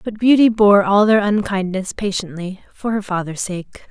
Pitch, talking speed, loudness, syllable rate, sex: 200 Hz, 170 wpm, -17 LUFS, 4.6 syllables/s, female